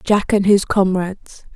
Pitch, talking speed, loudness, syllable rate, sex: 195 Hz, 155 wpm, -16 LUFS, 4.1 syllables/s, female